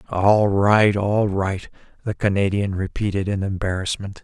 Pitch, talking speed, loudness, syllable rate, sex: 100 Hz, 125 wpm, -20 LUFS, 4.3 syllables/s, male